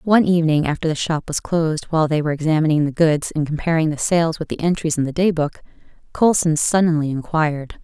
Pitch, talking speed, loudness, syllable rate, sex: 160 Hz, 205 wpm, -19 LUFS, 6.5 syllables/s, female